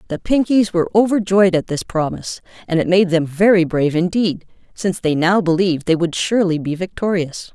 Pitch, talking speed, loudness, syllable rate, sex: 180 Hz, 185 wpm, -17 LUFS, 5.8 syllables/s, female